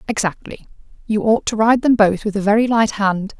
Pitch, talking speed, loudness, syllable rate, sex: 215 Hz, 210 wpm, -17 LUFS, 5.3 syllables/s, female